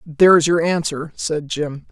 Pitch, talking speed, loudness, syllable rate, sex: 160 Hz, 155 wpm, -18 LUFS, 4.0 syllables/s, female